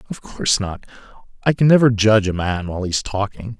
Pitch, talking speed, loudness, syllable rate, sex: 105 Hz, 185 wpm, -18 LUFS, 6.1 syllables/s, male